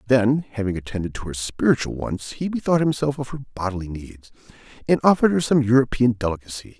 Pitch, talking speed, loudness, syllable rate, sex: 120 Hz, 175 wpm, -22 LUFS, 6.2 syllables/s, male